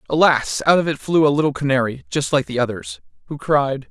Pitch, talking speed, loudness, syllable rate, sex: 145 Hz, 215 wpm, -18 LUFS, 5.7 syllables/s, male